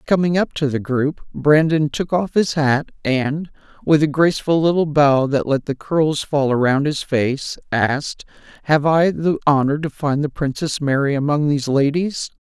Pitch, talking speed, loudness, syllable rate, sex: 150 Hz, 180 wpm, -18 LUFS, 4.5 syllables/s, male